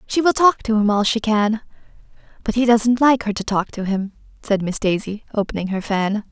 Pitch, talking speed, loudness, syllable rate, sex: 215 Hz, 220 wpm, -19 LUFS, 5.2 syllables/s, female